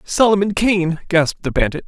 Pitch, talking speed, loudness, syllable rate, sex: 185 Hz, 160 wpm, -17 LUFS, 5.4 syllables/s, male